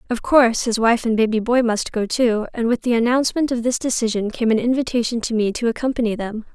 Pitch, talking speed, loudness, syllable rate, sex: 230 Hz, 230 wpm, -19 LUFS, 6.1 syllables/s, female